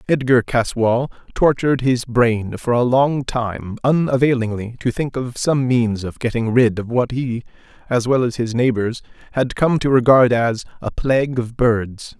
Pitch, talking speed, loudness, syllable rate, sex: 120 Hz, 170 wpm, -18 LUFS, 4.4 syllables/s, male